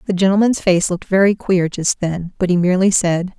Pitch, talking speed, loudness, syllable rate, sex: 185 Hz, 215 wpm, -16 LUFS, 5.7 syllables/s, female